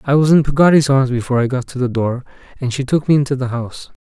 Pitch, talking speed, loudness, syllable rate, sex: 135 Hz, 270 wpm, -16 LUFS, 6.9 syllables/s, male